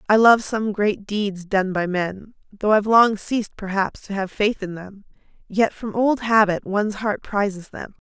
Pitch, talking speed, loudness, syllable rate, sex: 205 Hz, 195 wpm, -21 LUFS, 4.5 syllables/s, female